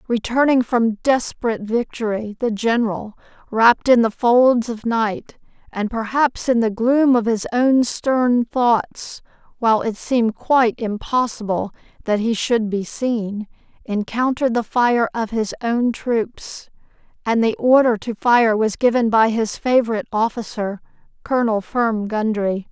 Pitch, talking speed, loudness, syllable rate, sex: 230 Hz, 140 wpm, -19 LUFS, 4.3 syllables/s, female